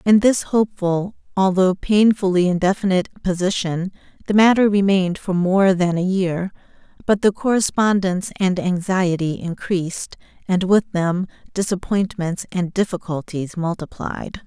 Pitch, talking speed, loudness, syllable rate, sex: 185 Hz, 115 wpm, -19 LUFS, 4.7 syllables/s, female